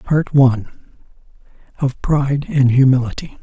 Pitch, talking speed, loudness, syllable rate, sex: 135 Hz, 105 wpm, -16 LUFS, 4.9 syllables/s, male